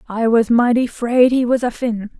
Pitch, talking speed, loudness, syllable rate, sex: 235 Hz, 220 wpm, -16 LUFS, 4.6 syllables/s, female